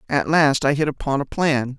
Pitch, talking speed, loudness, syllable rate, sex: 140 Hz, 235 wpm, -20 LUFS, 5.0 syllables/s, male